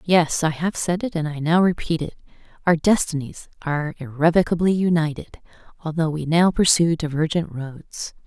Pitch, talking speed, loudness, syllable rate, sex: 165 Hz, 150 wpm, -21 LUFS, 5.0 syllables/s, female